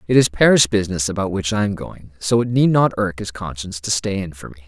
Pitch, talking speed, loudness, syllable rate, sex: 100 Hz, 270 wpm, -19 LUFS, 6.3 syllables/s, male